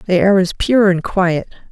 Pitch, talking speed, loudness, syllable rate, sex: 190 Hz, 210 wpm, -15 LUFS, 4.4 syllables/s, female